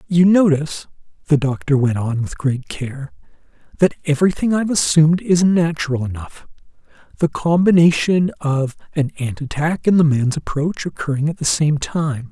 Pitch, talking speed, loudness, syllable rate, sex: 155 Hz, 150 wpm, -18 LUFS, 5.1 syllables/s, male